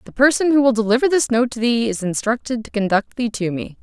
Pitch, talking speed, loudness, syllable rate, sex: 235 Hz, 250 wpm, -18 LUFS, 6.0 syllables/s, female